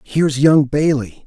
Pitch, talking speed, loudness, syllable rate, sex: 140 Hz, 140 wpm, -15 LUFS, 4.3 syllables/s, male